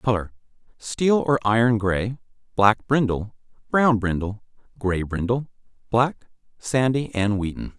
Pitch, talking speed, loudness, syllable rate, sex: 115 Hz, 110 wpm, -22 LUFS, 4.0 syllables/s, male